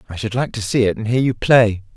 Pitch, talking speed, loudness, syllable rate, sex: 110 Hz, 305 wpm, -17 LUFS, 6.0 syllables/s, male